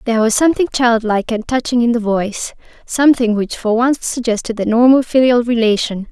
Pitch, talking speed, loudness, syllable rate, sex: 235 Hz, 175 wpm, -15 LUFS, 6.0 syllables/s, female